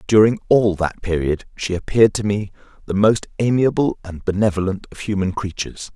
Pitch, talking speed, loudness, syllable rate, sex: 100 Hz, 160 wpm, -19 LUFS, 5.5 syllables/s, male